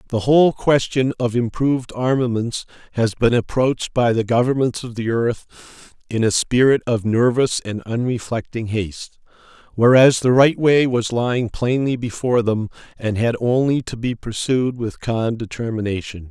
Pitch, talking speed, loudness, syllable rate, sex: 120 Hz, 150 wpm, -19 LUFS, 4.8 syllables/s, male